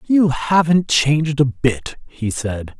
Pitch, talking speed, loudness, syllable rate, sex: 140 Hz, 150 wpm, -17 LUFS, 3.6 syllables/s, male